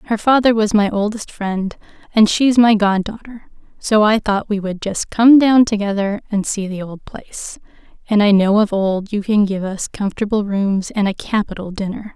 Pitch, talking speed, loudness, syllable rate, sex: 210 Hz, 200 wpm, -16 LUFS, 4.8 syllables/s, female